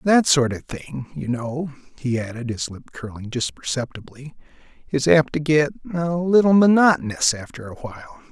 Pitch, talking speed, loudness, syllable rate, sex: 140 Hz, 165 wpm, -20 LUFS, 4.9 syllables/s, male